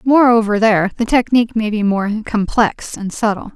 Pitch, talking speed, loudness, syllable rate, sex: 220 Hz, 170 wpm, -15 LUFS, 5.3 syllables/s, female